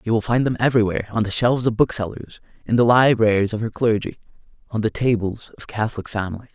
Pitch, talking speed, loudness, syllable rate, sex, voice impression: 110 Hz, 200 wpm, -20 LUFS, 6.6 syllables/s, male, masculine, adult-like, slightly soft, slightly fluent, sincere, calm